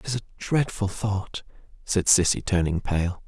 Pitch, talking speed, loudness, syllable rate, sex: 100 Hz, 165 wpm, -24 LUFS, 4.5 syllables/s, male